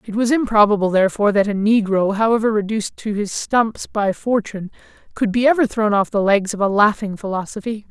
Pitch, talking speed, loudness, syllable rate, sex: 210 Hz, 190 wpm, -18 LUFS, 5.8 syllables/s, male